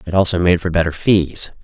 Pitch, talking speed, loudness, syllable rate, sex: 85 Hz, 220 wpm, -16 LUFS, 5.7 syllables/s, male